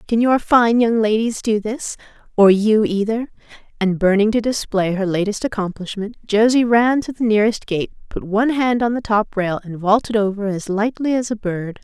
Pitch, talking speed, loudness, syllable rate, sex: 215 Hz, 195 wpm, -18 LUFS, 5.0 syllables/s, female